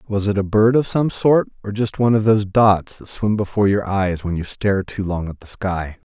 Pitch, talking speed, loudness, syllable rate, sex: 100 Hz, 255 wpm, -19 LUFS, 5.4 syllables/s, male